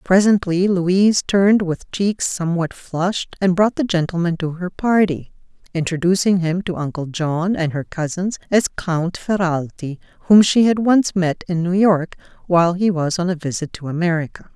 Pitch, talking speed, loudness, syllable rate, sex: 180 Hz, 170 wpm, -18 LUFS, 4.8 syllables/s, female